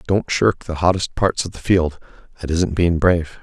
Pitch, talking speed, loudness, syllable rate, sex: 85 Hz, 210 wpm, -19 LUFS, 4.9 syllables/s, male